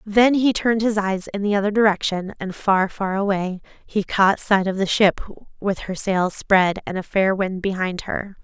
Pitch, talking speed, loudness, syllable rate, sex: 195 Hz, 205 wpm, -20 LUFS, 4.6 syllables/s, female